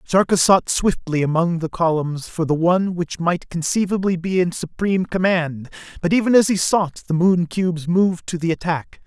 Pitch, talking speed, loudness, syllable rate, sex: 175 Hz, 185 wpm, -19 LUFS, 5.0 syllables/s, male